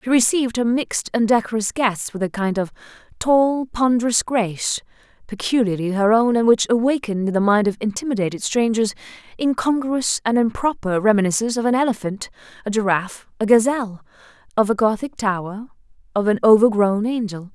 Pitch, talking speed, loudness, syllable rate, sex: 220 Hz, 150 wpm, -19 LUFS, 5.7 syllables/s, female